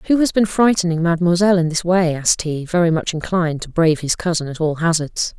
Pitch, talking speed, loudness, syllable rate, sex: 170 Hz, 225 wpm, -17 LUFS, 6.4 syllables/s, female